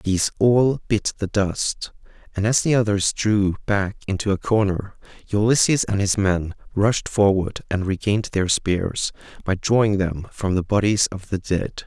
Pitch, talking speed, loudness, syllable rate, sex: 100 Hz, 165 wpm, -21 LUFS, 4.4 syllables/s, male